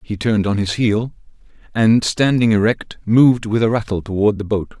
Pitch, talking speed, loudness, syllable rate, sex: 110 Hz, 190 wpm, -17 LUFS, 5.3 syllables/s, male